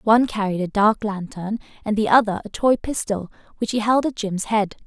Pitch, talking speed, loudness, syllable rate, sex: 215 Hz, 210 wpm, -21 LUFS, 5.3 syllables/s, female